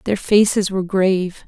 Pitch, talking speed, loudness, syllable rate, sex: 195 Hz, 165 wpm, -17 LUFS, 5.2 syllables/s, female